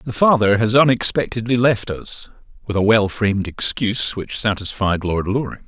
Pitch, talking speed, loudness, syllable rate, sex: 110 Hz, 150 wpm, -18 LUFS, 5.0 syllables/s, male